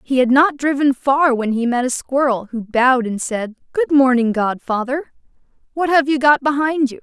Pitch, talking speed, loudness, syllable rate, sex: 265 Hz, 195 wpm, -17 LUFS, 4.9 syllables/s, female